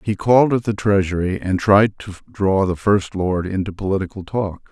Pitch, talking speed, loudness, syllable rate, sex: 100 Hz, 190 wpm, -18 LUFS, 5.0 syllables/s, male